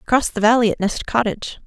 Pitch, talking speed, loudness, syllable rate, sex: 225 Hz, 215 wpm, -18 LUFS, 6.8 syllables/s, female